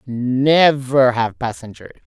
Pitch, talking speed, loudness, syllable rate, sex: 130 Hz, 85 wpm, -16 LUFS, 3.3 syllables/s, female